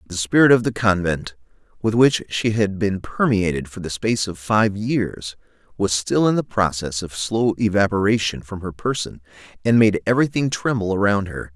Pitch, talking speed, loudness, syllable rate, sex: 100 Hz, 175 wpm, -20 LUFS, 5.0 syllables/s, male